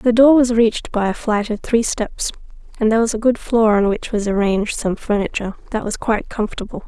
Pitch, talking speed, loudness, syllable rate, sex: 220 Hz, 225 wpm, -18 LUFS, 6.0 syllables/s, female